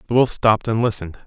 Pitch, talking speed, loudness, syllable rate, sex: 110 Hz, 240 wpm, -19 LUFS, 7.3 syllables/s, male